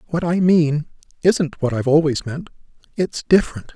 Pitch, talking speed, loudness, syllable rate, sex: 160 Hz, 160 wpm, -19 LUFS, 5.2 syllables/s, male